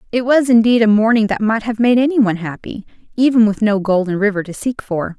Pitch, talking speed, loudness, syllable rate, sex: 220 Hz, 220 wpm, -15 LUFS, 5.8 syllables/s, female